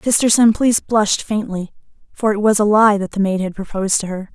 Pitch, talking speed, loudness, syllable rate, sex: 210 Hz, 220 wpm, -16 LUFS, 6.1 syllables/s, female